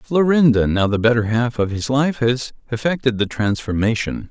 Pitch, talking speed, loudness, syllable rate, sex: 120 Hz, 140 wpm, -18 LUFS, 4.9 syllables/s, male